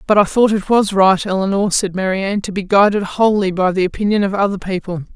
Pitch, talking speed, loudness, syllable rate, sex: 195 Hz, 220 wpm, -16 LUFS, 5.9 syllables/s, female